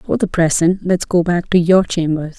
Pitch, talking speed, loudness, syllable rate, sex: 170 Hz, 225 wpm, -15 LUFS, 5.0 syllables/s, female